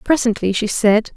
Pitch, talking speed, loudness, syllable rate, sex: 225 Hz, 155 wpm, -17 LUFS, 4.9 syllables/s, female